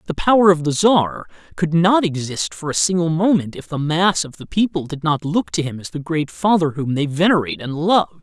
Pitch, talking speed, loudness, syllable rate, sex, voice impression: 165 Hz, 235 wpm, -18 LUFS, 5.3 syllables/s, male, masculine, slightly adult-like, tensed, slightly powerful, fluent, refreshing, slightly unique, lively